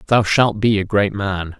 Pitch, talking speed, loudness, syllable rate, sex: 100 Hz, 225 wpm, -17 LUFS, 4.3 syllables/s, male